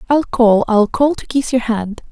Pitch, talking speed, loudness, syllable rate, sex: 240 Hz, 225 wpm, -15 LUFS, 4.3 syllables/s, female